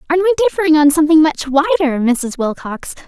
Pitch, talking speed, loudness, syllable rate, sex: 310 Hz, 175 wpm, -14 LUFS, 6.9 syllables/s, female